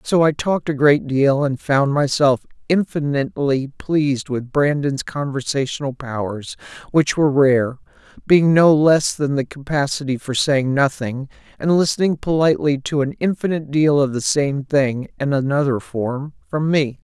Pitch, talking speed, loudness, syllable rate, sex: 140 Hz, 150 wpm, -19 LUFS, 4.7 syllables/s, male